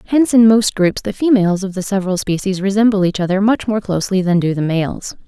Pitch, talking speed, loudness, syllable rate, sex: 200 Hz, 230 wpm, -15 LUFS, 6.2 syllables/s, female